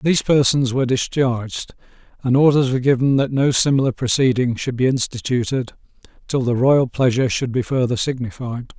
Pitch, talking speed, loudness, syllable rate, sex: 130 Hz, 155 wpm, -18 LUFS, 5.7 syllables/s, male